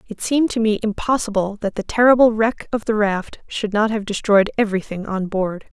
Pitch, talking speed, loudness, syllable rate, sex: 215 Hz, 195 wpm, -19 LUFS, 5.5 syllables/s, female